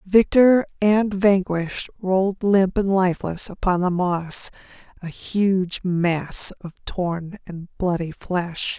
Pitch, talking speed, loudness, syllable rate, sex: 185 Hz, 125 wpm, -21 LUFS, 3.5 syllables/s, female